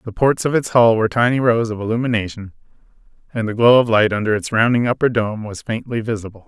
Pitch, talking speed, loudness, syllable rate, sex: 115 Hz, 215 wpm, -17 LUFS, 6.3 syllables/s, male